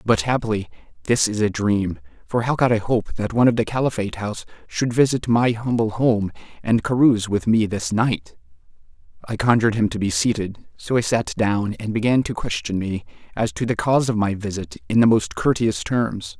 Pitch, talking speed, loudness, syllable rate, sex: 110 Hz, 200 wpm, -21 LUFS, 5.3 syllables/s, male